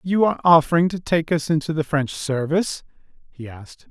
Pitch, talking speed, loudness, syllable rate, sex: 155 Hz, 185 wpm, -20 LUFS, 5.8 syllables/s, male